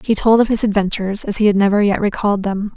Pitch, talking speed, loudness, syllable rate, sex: 205 Hz, 260 wpm, -15 LUFS, 6.8 syllables/s, female